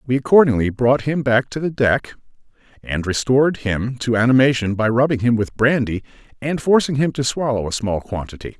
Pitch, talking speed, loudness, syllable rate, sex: 125 Hz, 180 wpm, -18 LUFS, 5.4 syllables/s, male